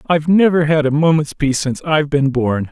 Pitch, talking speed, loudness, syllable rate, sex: 150 Hz, 220 wpm, -15 LUFS, 6.3 syllables/s, male